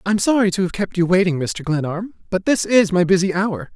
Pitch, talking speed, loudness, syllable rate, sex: 185 Hz, 255 wpm, -18 LUFS, 5.7 syllables/s, male